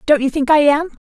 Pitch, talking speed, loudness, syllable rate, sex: 295 Hz, 280 wpm, -15 LUFS, 6.3 syllables/s, female